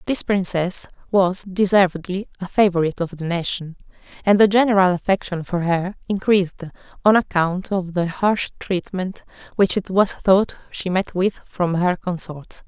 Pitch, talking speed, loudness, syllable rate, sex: 185 Hz, 150 wpm, -20 LUFS, 4.7 syllables/s, female